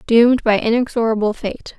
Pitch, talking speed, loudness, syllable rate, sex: 225 Hz, 135 wpm, -17 LUFS, 5.5 syllables/s, female